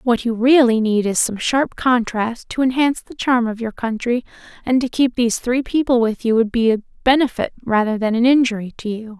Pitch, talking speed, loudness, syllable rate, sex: 235 Hz, 215 wpm, -18 LUFS, 5.4 syllables/s, female